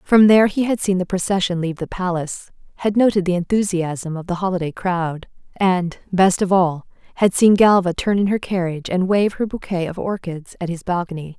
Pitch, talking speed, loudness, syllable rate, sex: 185 Hz, 200 wpm, -19 LUFS, 5.5 syllables/s, female